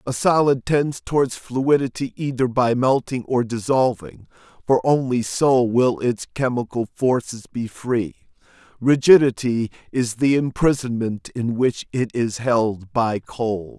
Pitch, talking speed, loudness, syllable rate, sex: 125 Hz, 130 wpm, -20 LUFS, 4.0 syllables/s, male